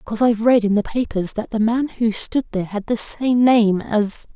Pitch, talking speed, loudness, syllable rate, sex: 225 Hz, 235 wpm, -18 LUFS, 5.4 syllables/s, female